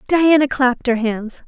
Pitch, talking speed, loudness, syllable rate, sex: 260 Hz, 165 wpm, -16 LUFS, 4.7 syllables/s, female